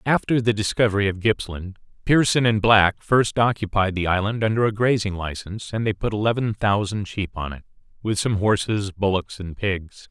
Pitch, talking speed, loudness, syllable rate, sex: 105 Hz, 180 wpm, -22 LUFS, 5.2 syllables/s, male